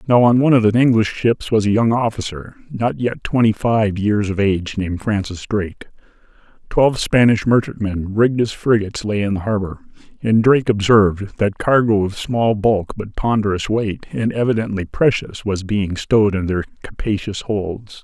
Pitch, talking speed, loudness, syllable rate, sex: 105 Hz, 175 wpm, -18 LUFS, 5.1 syllables/s, male